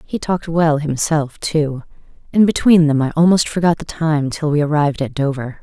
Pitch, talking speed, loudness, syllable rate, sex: 155 Hz, 190 wpm, -16 LUFS, 5.2 syllables/s, female